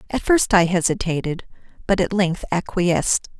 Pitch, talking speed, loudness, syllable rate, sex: 185 Hz, 140 wpm, -20 LUFS, 4.9 syllables/s, female